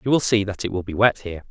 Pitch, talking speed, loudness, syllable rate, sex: 105 Hz, 360 wpm, -21 LUFS, 7.3 syllables/s, male